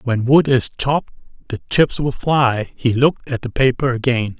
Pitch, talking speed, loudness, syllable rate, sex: 130 Hz, 190 wpm, -17 LUFS, 4.8 syllables/s, male